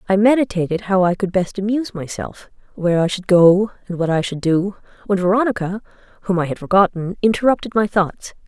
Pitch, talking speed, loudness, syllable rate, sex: 190 Hz, 185 wpm, -18 LUFS, 5.9 syllables/s, female